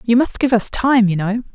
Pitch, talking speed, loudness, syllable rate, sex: 230 Hz, 270 wpm, -16 LUFS, 5.2 syllables/s, female